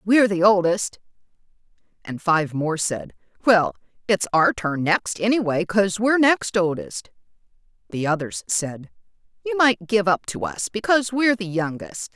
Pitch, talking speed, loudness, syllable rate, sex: 185 Hz, 150 wpm, -21 LUFS, 4.8 syllables/s, female